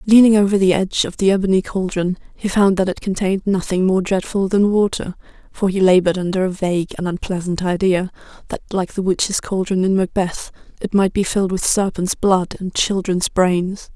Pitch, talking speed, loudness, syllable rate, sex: 190 Hz, 190 wpm, -18 LUFS, 5.4 syllables/s, female